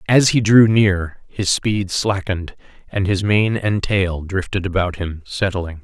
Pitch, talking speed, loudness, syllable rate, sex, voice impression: 95 Hz, 165 wpm, -18 LUFS, 4.0 syllables/s, male, masculine, adult-like, middle-aged, thick, powerful, clear, raspy, intellectual, slightly sincere, mature, wild, lively, slightly strict